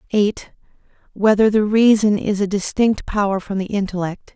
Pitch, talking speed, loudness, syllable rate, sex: 205 Hz, 150 wpm, -18 LUFS, 5.6 syllables/s, female